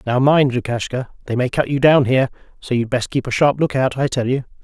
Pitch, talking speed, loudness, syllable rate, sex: 130 Hz, 245 wpm, -18 LUFS, 5.8 syllables/s, male